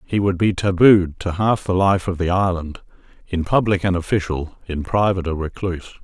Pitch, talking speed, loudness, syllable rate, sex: 90 Hz, 180 wpm, -19 LUFS, 5.3 syllables/s, male